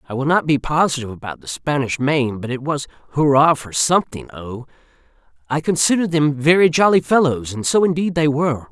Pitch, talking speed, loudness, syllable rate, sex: 145 Hz, 185 wpm, -18 LUFS, 5.8 syllables/s, male